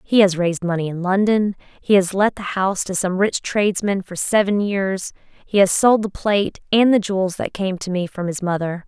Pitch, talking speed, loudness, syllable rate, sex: 190 Hz, 225 wpm, -19 LUFS, 5.3 syllables/s, female